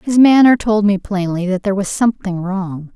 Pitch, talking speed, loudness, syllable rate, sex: 200 Hz, 205 wpm, -15 LUFS, 5.3 syllables/s, female